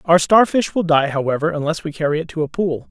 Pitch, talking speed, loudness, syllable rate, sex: 160 Hz, 250 wpm, -18 LUFS, 6.1 syllables/s, male